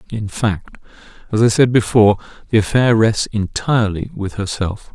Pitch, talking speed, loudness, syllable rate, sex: 110 Hz, 145 wpm, -17 LUFS, 4.9 syllables/s, male